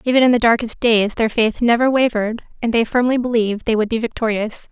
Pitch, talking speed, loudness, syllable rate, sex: 230 Hz, 215 wpm, -17 LUFS, 6.1 syllables/s, female